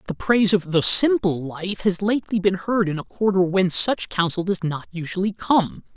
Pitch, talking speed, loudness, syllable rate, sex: 185 Hz, 200 wpm, -20 LUFS, 5.1 syllables/s, male